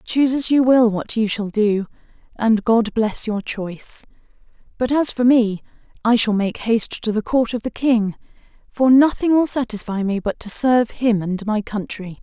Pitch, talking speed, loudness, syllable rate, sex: 225 Hz, 190 wpm, -19 LUFS, 4.7 syllables/s, female